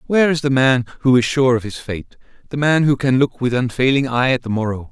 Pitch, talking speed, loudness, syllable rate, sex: 130 Hz, 255 wpm, -17 LUFS, 5.9 syllables/s, male